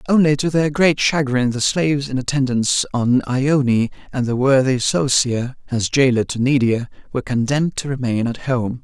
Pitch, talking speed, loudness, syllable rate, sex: 130 Hz, 170 wpm, -18 LUFS, 4.8 syllables/s, male